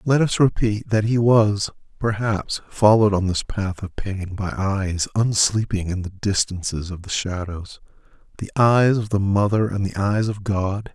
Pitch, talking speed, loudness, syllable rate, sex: 100 Hz, 170 wpm, -21 LUFS, 4.3 syllables/s, male